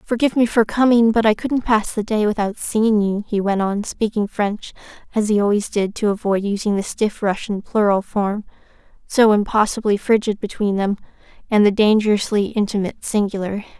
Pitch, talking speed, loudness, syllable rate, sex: 210 Hz, 175 wpm, -19 LUFS, 5.3 syllables/s, female